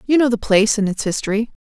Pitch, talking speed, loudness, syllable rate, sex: 220 Hz, 260 wpm, -17 LUFS, 7.2 syllables/s, female